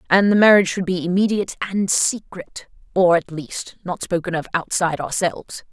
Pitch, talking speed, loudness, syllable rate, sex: 180 Hz, 155 wpm, -19 LUFS, 5.5 syllables/s, female